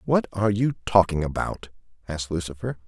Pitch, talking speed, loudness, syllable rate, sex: 95 Hz, 145 wpm, -24 LUFS, 5.7 syllables/s, male